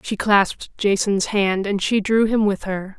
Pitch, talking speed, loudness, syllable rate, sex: 200 Hz, 200 wpm, -19 LUFS, 4.2 syllables/s, female